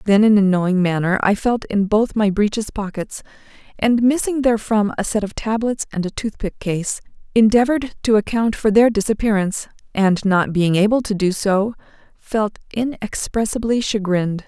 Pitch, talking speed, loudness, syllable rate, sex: 210 Hz, 160 wpm, -18 LUFS, 5.1 syllables/s, female